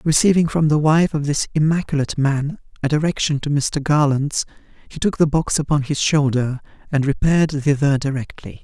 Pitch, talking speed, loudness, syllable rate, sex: 145 Hz, 165 wpm, -19 LUFS, 5.3 syllables/s, male